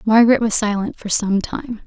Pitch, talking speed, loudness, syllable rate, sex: 215 Hz, 195 wpm, -17 LUFS, 5.1 syllables/s, female